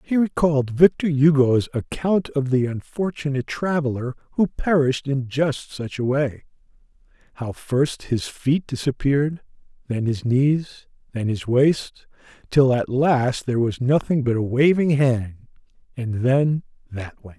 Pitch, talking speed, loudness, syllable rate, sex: 135 Hz, 140 wpm, -21 LUFS, 4.3 syllables/s, male